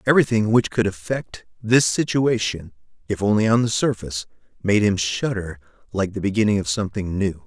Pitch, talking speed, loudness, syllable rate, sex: 105 Hz, 160 wpm, -21 LUFS, 5.5 syllables/s, male